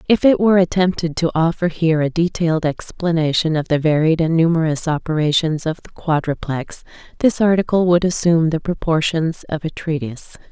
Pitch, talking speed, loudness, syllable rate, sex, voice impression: 165 Hz, 160 wpm, -18 LUFS, 5.6 syllables/s, female, very feminine, very middle-aged, thin, slightly relaxed, slightly weak, slightly dark, very soft, very clear, fluent, cute, very intellectual, very refreshing, very sincere, very calm, very friendly, very reassuring, unique, very elegant, very sweet, lively, very kind, very modest, light